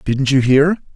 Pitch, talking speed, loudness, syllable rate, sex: 140 Hz, 190 wpm, -14 LUFS, 4.4 syllables/s, male